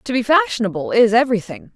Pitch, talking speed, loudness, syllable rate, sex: 225 Hz, 170 wpm, -17 LUFS, 6.7 syllables/s, female